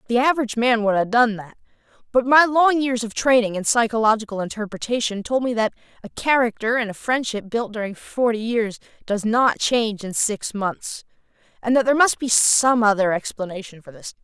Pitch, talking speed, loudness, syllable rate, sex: 225 Hz, 185 wpm, -20 LUFS, 5.5 syllables/s, female